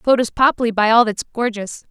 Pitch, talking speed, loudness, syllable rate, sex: 230 Hz, 190 wpm, -17 LUFS, 4.9 syllables/s, female